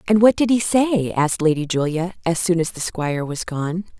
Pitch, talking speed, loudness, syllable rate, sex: 175 Hz, 225 wpm, -20 LUFS, 5.4 syllables/s, female